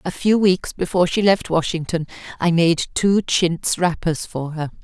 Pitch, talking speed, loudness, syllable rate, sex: 175 Hz, 175 wpm, -19 LUFS, 4.5 syllables/s, female